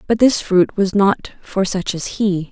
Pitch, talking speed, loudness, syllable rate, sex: 195 Hz, 215 wpm, -17 LUFS, 3.9 syllables/s, female